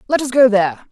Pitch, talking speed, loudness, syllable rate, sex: 240 Hz, 265 wpm, -14 LUFS, 6.9 syllables/s, female